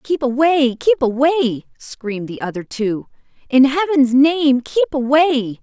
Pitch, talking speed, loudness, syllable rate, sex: 270 Hz, 140 wpm, -16 LUFS, 4.2 syllables/s, female